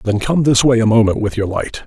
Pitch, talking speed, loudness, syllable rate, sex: 115 Hz, 290 wpm, -15 LUFS, 5.7 syllables/s, male